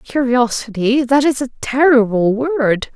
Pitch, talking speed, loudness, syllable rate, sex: 250 Hz, 100 wpm, -15 LUFS, 4.0 syllables/s, female